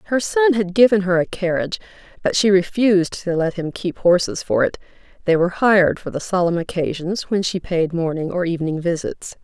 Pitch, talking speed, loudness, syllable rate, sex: 185 Hz, 195 wpm, -19 LUFS, 5.6 syllables/s, female